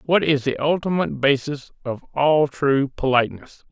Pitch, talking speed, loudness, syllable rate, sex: 140 Hz, 145 wpm, -21 LUFS, 4.9 syllables/s, male